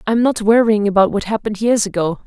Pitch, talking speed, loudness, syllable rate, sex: 210 Hz, 210 wpm, -16 LUFS, 6.3 syllables/s, female